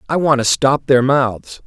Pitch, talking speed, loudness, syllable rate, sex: 130 Hz, 215 wpm, -15 LUFS, 4.1 syllables/s, male